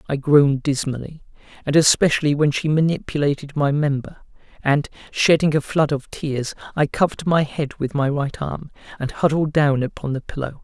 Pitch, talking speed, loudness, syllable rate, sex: 145 Hz, 170 wpm, -20 LUFS, 5.2 syllables/s, male